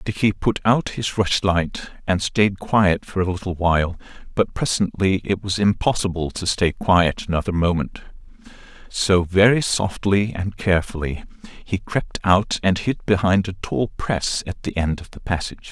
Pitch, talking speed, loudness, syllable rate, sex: 95 Hz, 160 wpm, -21 LUFS, 4.5 syllables/s, male